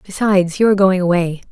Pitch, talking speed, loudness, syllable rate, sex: 185 Hz, 200 wpm, -15 LUFS, 6.8 syllables/s, female